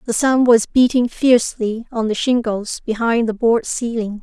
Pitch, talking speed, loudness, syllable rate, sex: 230 Hz, 170 wpm, -17 LUFS, 4.5 syllables/s, female